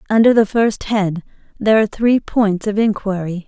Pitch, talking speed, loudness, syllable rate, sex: 205 Hz, 175 wpm, -16 LUFS, 5.1 syllables/s, female